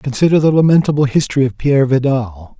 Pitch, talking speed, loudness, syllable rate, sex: 135 Hz, 160 wpm, -14 LUFS, 6.3 syllables/s, male